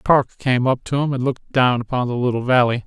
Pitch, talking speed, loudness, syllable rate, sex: 125 Hz, 250 wpm, -19 LUFS, 6.0 syllables/s, male